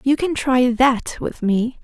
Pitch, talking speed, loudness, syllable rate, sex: 250 Hz, 195 wpm, -19 LUFS, 3.6 syllables/s, female